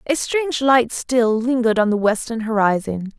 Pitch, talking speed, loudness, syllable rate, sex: 235 Hz, 170 wpm, -18 LUFS, 5.0 syllables/s, female